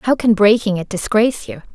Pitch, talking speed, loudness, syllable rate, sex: 215 Hz, 205 wpm, -15 LUFS, 5.6 syllables/s, female